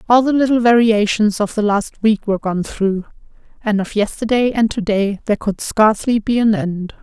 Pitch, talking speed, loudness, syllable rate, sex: 215 Hz, 190 wpm, -16 LUFS, 5.2 syllables/s, female